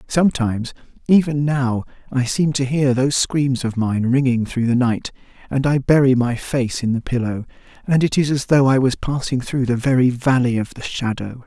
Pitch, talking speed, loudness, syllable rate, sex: 130 Hz, 200 wpm, -19 LUFS, 5.0 syllables/s, male